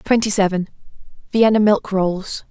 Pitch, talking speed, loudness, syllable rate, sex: 200 Hz, 95 wpm, -17 LUFS, 4.4 syllables/s, female